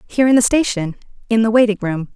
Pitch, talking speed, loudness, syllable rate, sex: 220 Hz, 195 wpm, -16 LUFS, 6.7 syllables/s, female